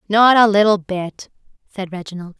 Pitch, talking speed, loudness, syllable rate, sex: 195 Hz, 150 wpm, -15 LUFS, 5.1 syllables/s, female